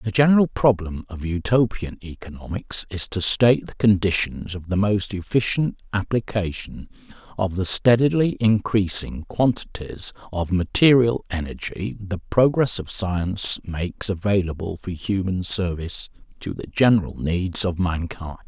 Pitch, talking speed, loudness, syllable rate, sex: 100 Hz, 125 wpm, -22 LUFS, 4.6 syllables/s, male